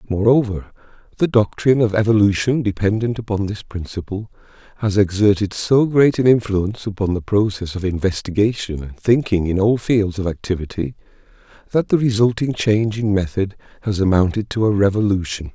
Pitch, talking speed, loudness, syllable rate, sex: 105 Hz, 145 wpm, -18 LUFS, 5.5 syllables/s, male